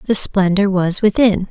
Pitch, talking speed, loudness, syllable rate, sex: 195 Hz, 160 wpm, -15 LUFS, 4.4 syllables/s, female